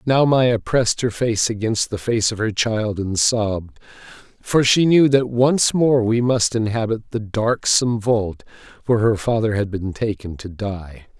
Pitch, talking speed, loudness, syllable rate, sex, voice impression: 110 Hz, 175 wpm, -19 LUFS, 4.4 syllables/s, male, very masculine, very adult-like, slightly thick, slightly sincere, slightly unique